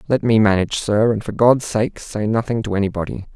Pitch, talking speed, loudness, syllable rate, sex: 110 Hz, 215 wpm, -18 LUFS, 5.8 syllables/s, male